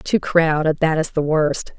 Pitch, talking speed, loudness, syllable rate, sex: 155 Hz, 200 wpm, -18 LUFS, 4.1 syllables/s, female